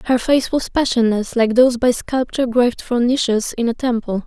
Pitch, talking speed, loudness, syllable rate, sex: 240 Hz, 195 wpm, -17 LUFS, 5.1 syllables/s, female